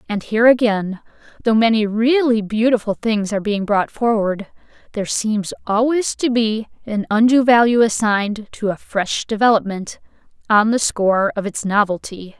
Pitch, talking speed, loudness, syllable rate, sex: 215 Hz, 150 wpm, -17 LUFS, 4.9 syllables/s, female